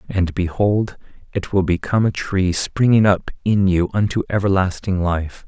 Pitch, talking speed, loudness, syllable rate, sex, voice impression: 95 Hz, 155 wpm, -19 LUFS, 4.6 syllables/s, male, masculine, adult-like, relaxed, soft, slightly muffled, cool, intellectual, calm, friendly, reassuring, wild, kind, slightly modest